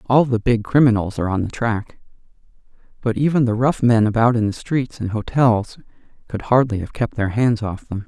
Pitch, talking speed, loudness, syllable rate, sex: 115 Hz, 200 wpm, -19 LUFS, 5.3 syllables/s, male